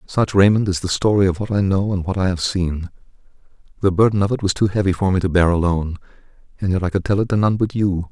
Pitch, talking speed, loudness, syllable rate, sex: 95 Hz, 265 wpm, -18 LUFS, 6.5 syllables/s, male